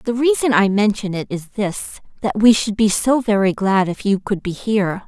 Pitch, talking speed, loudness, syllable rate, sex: 205 Hz, 225 wpm, -18 LUFS, 4.8 syllables/s, female